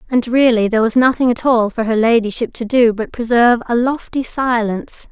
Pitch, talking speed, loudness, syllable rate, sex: 235 Hz, 200 wpm, -15 LUFS, 5.6 syllables/s, female